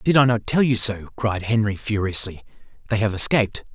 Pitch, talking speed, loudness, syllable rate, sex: 110 Hz, 190 wpm, -21 LUFS, 5.4 syllables/s, male